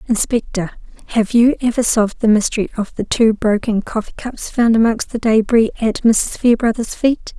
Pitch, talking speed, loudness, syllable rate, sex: 225 Hz, 170 wpm, -16 LUFS, 5.0 syllables/s, female